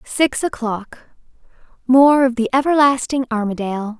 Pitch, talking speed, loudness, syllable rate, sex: 250 Hz, 90 wpm, -17 LUFS, 5.0 syllables/s, female